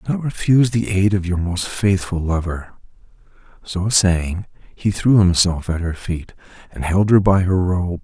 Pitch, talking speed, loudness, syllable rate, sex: 95 Hz, 180 wpm, -18 LUFS, 4.4 syllables/s, male